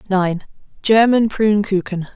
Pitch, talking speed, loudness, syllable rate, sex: 200 Hz, 85 wpm, -17 LUFS, 4.5 syllables/s, female